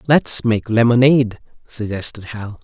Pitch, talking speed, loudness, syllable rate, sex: 115 Hz, 115 wpm, -16 LUFS, 4.4 syllables/s, male